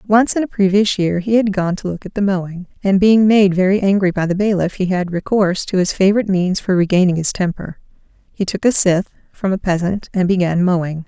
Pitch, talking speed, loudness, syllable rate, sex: 190 Hz, 220 wpm, -16 LUFS, 5.9 syllables/s, female